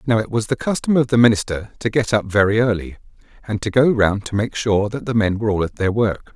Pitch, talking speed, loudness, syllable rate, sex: 110 Hz, 265 wpm, -19 LUFS, 6.0 syllables/s, male